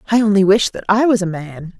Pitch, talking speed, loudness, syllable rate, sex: 200 Hz, 270 wpm, -15 LUFS, 6.0 syllables/s, female